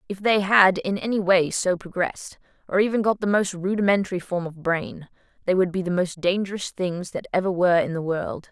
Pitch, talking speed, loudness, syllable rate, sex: 185 Hz, 210 wpm, -23 LUFS, 5.5 syllables/s, female